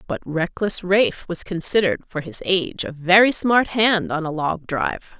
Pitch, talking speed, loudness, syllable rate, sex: 180 Hz, 185 wpm, -20 LUFS, 5.0 syllables/s, female